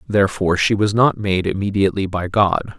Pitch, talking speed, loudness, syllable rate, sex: 100 Hz, 170 wpm, -18 LUFS, 5.7 syllables/s, male